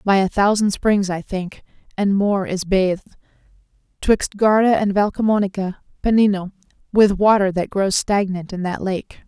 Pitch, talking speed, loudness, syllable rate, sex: 195 Hz, 155 wpm, -19 LUFS, 4.8 syllables/s, female